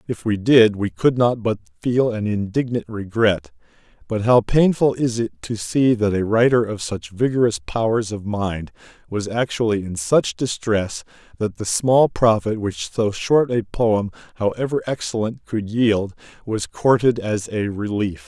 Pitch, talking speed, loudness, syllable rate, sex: 110 Hz, 165 wpm, -20 LUFS, 4.3 syllables/s, male